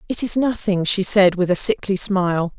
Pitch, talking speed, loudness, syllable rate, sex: 195 Hz, 210 wpm, -17 LUFS, 5.0 syllables/s, female